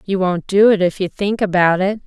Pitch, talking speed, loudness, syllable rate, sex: 190 Hz, 260 wpm, -16 LUFS, 5.2 syllables/s, female